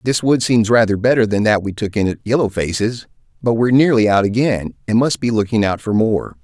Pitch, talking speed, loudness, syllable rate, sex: 110 Hz, 235 wpm, -16 LUFS, 5.7 syllables/s, male